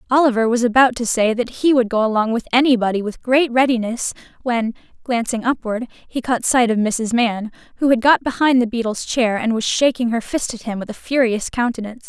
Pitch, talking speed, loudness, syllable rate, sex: 235 Hz, 210 wpm, -18 LUFS, 5.6 syllables/s, female